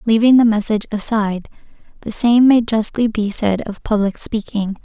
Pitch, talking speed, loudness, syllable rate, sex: 220 Hz, 160 wpm, -16 LUFS, 5.1 syllables/s, female